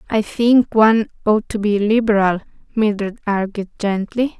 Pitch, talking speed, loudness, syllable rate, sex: 215 Hz, 135 wpm, -17 LUFS, 4.5 syllables/s, female